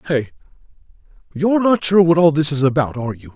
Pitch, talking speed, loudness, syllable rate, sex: 155 Hz, 195 wpm, -16 LUFS, 6.5 syllables/s, male